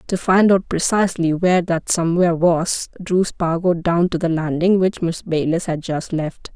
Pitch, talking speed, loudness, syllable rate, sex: 170 Hz, 185 wpm, -18 LUFS, 4.8 syllables/s, female